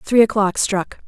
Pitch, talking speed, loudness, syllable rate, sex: 205 Hz, 165 wpm, -18 LUFS, 4.4 syllables/s, female